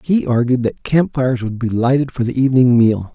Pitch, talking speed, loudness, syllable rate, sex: 125 Hz, 230 wpm, -16 LUFS, 5.6 syllables/s, male